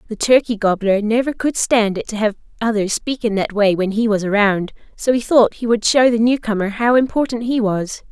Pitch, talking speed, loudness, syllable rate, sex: 220 Hz, 220 wpm, -17 LUFS, 5.3 syllables/s, female